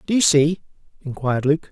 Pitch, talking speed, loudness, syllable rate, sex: 150 Hz, 175 wpm, -19 LUFS, 5.9 syllables/s, male